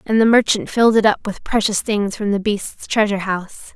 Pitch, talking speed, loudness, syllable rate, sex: 210 Hz, 225 wpm, -18 LUFS, 5.5 syllables/s, female